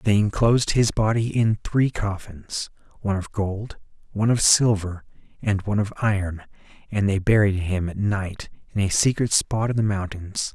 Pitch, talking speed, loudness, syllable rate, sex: 105 Hz, 160 wpm, -22 LUFS, 4.8 syllables/s, male